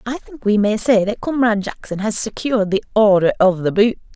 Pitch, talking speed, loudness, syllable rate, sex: 215 Hz, 215 wpm, -17 LUFS, 5.7 syllables/s, female